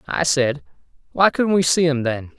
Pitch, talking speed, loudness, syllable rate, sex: 145 Hz, 200 wpm, -18 LUFS, 4.7 syllables/s, male